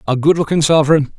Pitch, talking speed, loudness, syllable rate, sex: 150 Hz, 150 wpm, -14 LUFS, 6.9 syllables/s, male